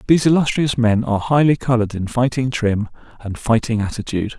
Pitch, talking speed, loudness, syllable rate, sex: 120 Hz, 165 wpm, -18 LUFS, 6.1 syllables/s, male